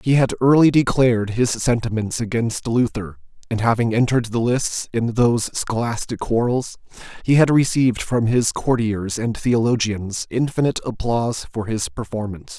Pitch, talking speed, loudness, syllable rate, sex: 120 Hz, 145 wpm, -20 LUFS, 5.0 syllables/s, male